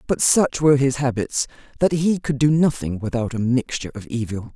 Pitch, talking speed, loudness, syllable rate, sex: 130 Hz, 195 wpm, -20 LUFS, 5.5 syllables/s, female